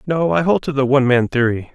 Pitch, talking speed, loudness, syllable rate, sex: 130 Hz, 275 wpm, -16 LUFS, 6.1 syllables/s, male